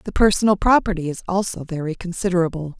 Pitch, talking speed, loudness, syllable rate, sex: 180 Hz, 150 wpm, -20 LUFS, 6.5 syllables/s, female